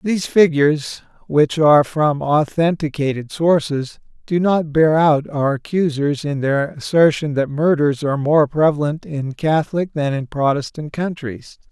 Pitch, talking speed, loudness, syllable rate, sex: 150 Hz, 140 wpm, -18 LUFS, 4.5 syllables/s, male